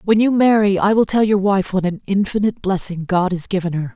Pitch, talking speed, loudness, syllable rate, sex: 195 Hz, 245 wpm, -17 LUFS, 5.9 syllables/s, female